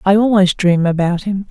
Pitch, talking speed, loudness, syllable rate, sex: 190 Hz, 200 wpm, -14 LUFS, 5.0 syllables/s, female